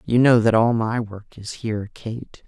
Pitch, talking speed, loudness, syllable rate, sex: 110 Hz, 220 wpm, -20 LUFS, 4.3 syllables/s, female